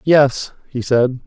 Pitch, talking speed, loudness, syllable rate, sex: 130 Hz, 140 wpm, -17 LUFS, 3.1 syllables/s, male